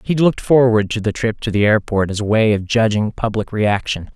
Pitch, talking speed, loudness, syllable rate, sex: 110 Hz, 230 wpm, -17 LUFS, 5.5 syllables/s, male